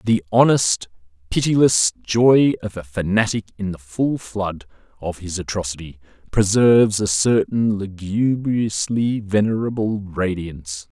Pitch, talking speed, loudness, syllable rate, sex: 100 Hz, 110 wpm, -19 LUFS, 4.2 syllables/s, male